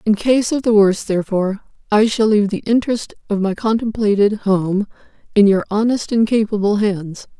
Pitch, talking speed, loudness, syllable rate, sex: 210 Hz, 170 wpm, -17 LUFS, 5.3 syllables/s, female